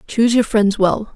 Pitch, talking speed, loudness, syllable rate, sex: 215 Hz, 210 wpm, -16 LUFS, 5.0 syllables/s, female